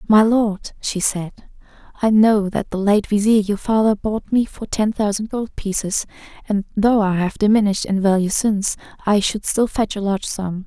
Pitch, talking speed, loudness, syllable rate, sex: 205 Hz, 190 wpm, -19 LUFS, 4.9 syllables/s, female